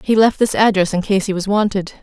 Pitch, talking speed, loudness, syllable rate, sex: 200 Hz, 265 wpm, -16 LUFS, 6.0 syllables/s, female